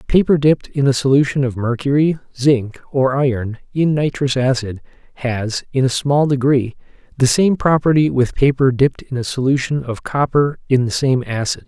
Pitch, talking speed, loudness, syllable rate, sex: 135 Hz, 170 wpm, -17 LUFS, 5.1 syllables/s, male